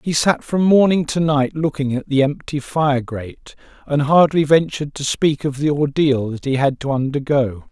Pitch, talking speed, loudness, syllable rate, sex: 145 Hz, 195 wpm, -18 LUFS, 4.8 syllables/s, male